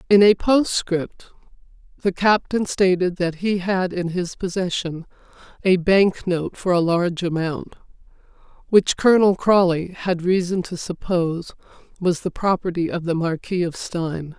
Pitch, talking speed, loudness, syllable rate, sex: 180 Hz, 140 wpm, -20 LUFS, 4.5 syllables/s, female